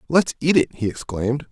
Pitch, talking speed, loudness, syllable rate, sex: 135 Hz, 200 wpm, -21 LUFS, 5.8 syllables/s, male